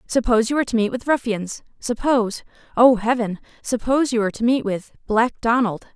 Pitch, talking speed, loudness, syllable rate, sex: 235 Hz, 150 wpm, -20 LUFS, 6.0 syllables/s, female